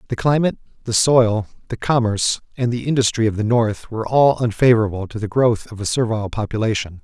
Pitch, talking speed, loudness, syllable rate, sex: 115 Hz, 190 wpm, -19 LUFS, 6.2 syllables/s, male